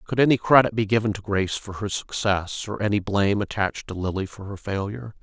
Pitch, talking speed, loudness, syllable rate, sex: 105 Hz, 220 wpm, -23 LUFS, 5.9 syllables/s, male